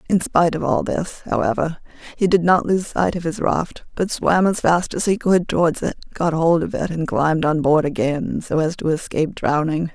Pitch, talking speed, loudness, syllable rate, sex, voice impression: 165 Hz, 225 wpm, -19 LUFS, 5.2 syllables/s, female, feminine, adult-like, weak, slightly dark, soft, very raspy, slightly nasal, intellectual, calm, reassuring, modest